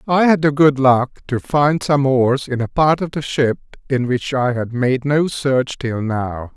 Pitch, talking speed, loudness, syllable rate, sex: 135 Hz, 220 wpm, -17 LUFS, 4.0 syllables/s, male